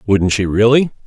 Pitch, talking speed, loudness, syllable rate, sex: 110 Hz, 170 wpm, -14 LUFS, 5.0 syllables/s, male